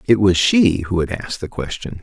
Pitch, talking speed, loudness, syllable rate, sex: 105 Hz, 235 wpm, -18 LUFS, 5.3 syllables/s, male